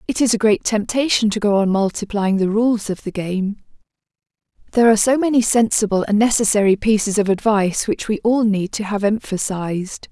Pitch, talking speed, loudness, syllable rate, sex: 210 Hz, 185 wpm, -18 LUFS, 5.6 syllables/s, female